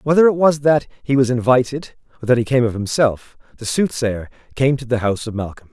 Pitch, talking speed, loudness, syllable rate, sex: 125 Hz, 220 wpm, -18 LUFS, 5.8 syllables/s, male